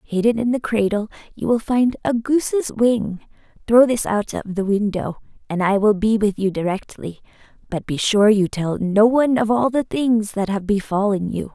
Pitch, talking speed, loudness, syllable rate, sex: 215 Hz, 200 wpm, -19 LUFS, 4.8 syllables/s, female